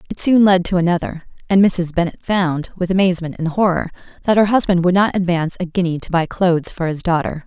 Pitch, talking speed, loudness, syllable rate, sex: 175 Hz, 215 wpm, -17 LUFS, 6.2 syllables/s, female